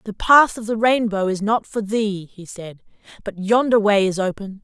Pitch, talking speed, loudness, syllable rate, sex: 210 Hz, 205 wpm, -18 LUFS, 4.7 syllables/s, female